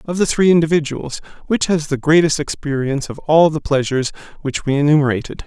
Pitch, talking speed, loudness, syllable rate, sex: 150 Hz, 175 wpm, -17 LUFS, 6.1 syllables/s, male